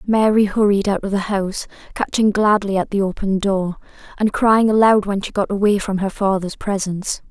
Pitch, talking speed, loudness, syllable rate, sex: 200 Hz, 190 wpm, -18 LUFS, 5.2 syllables/s, female